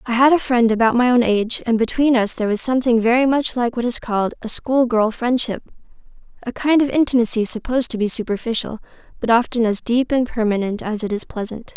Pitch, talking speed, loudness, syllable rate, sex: 235 Hz, 215 wpm, -18 LUFS, 6.0 syllables/s, female